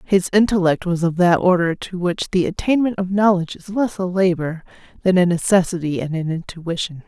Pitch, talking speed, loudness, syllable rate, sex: 180 Hz, 185 wpm, -19 LUFS, 5.4 syllables/s, female